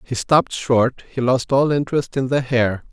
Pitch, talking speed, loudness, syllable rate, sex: 130 Hz, 205 wpm, -19 LUFS, 4.8 syllables/s, male